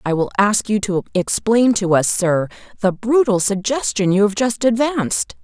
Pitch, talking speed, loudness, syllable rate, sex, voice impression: 210 Hz, 175 wpm, -17 LUFS, 4.6 syllables/s, female, feminine, adult-like, tensed, powerful, clear, fluent, intellectual, calm, elegant, lively, slightly strict